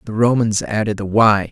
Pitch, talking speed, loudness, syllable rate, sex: 110 Hz, 200 wpm, -17 LUFS, 5.1 syllables/s, male